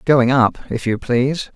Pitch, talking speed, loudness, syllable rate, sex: 130 Hz, 190 wpm, -17 LUFS, 4.3 syllables/s, male